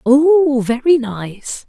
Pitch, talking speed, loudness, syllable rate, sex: 265 Hz, 105 wpm, -14 LUFS, 2.6 syllables/s, female